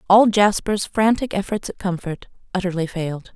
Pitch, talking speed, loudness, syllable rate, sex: 195 Hz, 145 wpm, -21 LUFS, 5.1 syllables/s, female